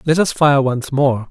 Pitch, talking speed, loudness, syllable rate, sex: 140 Hz, 230 wpm, -15 LUFS, 4.4 syllables/s, male